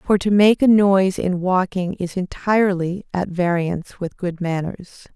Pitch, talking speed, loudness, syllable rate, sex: 185 Hz, 165 wpm, -19 LUFS, 4.6 syllables/s, female